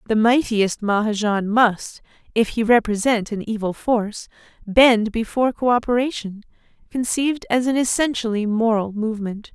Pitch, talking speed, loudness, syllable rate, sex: 225 Hz, 120 wpm, -20 LUFS, 4.9 syllables/s, female